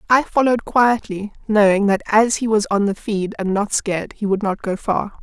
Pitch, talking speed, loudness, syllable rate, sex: 210 Hz, 220 wpm, -18 LUFS, 5.1 syllables/s, female